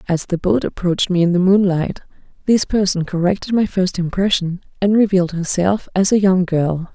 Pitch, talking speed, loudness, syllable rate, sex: 185 Hz, 180 wpm, -17 LUFS, 5.3 syllables/s, female